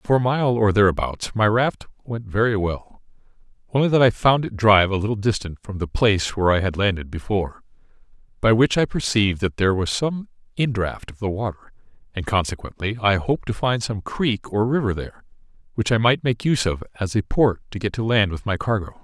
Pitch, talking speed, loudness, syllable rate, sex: 105 Hz, 210 wpm, -21 LUFS, 5.8 syllables/s, male